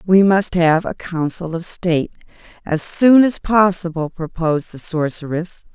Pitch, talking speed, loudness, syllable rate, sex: 175 Hz, 145 wpm, -17 LUFS, 4.4 syllables/s, female